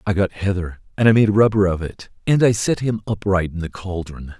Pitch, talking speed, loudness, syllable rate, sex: 100 Hz, 245 wpm, -19 LUFS, 5.6 syllables/s, male